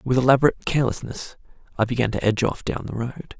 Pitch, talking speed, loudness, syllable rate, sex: 125 Hz, 195 wpm, -22 LUFS, 7.3 syllables/s, male